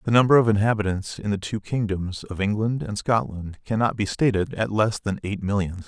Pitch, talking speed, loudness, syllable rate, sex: 105 Hz, 205 wpm, -23 LUFS, 5.3 syllables/s, male